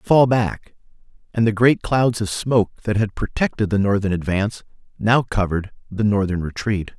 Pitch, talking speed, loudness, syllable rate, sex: 105 Hz, 165 wpm, -20 LUFS, 5.1 syllables/s, male